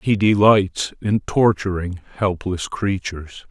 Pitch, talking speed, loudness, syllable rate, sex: 100 Hz, 105 wpm, -19 LUFS, 3.8 syllables/s, male